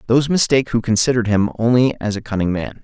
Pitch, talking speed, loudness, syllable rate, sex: 115 Hz, 210 wpm, -17 LUFS, 7.4 syllables/s, male